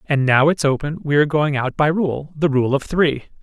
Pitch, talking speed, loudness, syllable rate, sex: 145 Hz, 230 wpm, -18 LUFS, 5.1 syllables/s, male